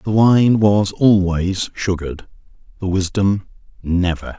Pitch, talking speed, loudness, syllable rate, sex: 95 Hz, 110 wpm, -17 LUFS, 4.0 syllables/s, male